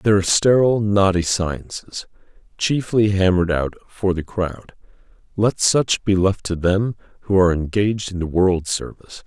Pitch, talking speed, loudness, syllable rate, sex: 95 Hz, 155 wpm, -19 LUFS, 5.0 syllables/s, male